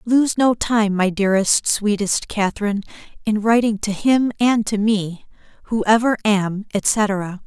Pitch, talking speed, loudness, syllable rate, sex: 210 Hz, 145 wpm, -19 LUFS, 4.2 syllables/s, female